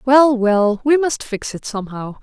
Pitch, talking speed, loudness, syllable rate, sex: 240 Hz, 190 wpm, -17 LUFS, 4.4 syllables/s, female